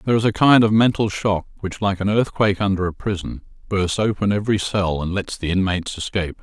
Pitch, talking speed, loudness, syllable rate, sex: 100 Hz, 215 wpm, -20 LUFS, 6.1 syllables/s, male